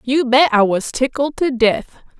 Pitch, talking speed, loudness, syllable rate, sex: 255 Hz, 190 wpm, -16 LUFS, 4.3 syllables/s, female